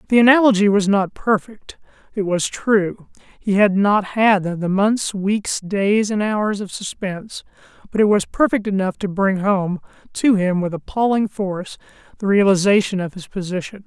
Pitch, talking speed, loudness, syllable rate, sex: 200 Hz, 165 wpm, -18 LUFS, 4.6 syllables/s, male